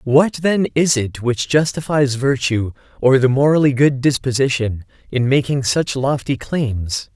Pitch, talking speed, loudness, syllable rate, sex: 135 Hz, 145 wpm, -17 LUFS, 4.2 syllables/s, male